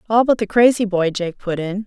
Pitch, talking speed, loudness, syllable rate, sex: 205 Hz, 260 wpm, -18 LUFS, 5.4 syllables/s, female